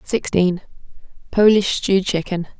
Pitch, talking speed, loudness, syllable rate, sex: 190 Hz, 70 wpm, -18 LUFS, 4.6 syllables/s, female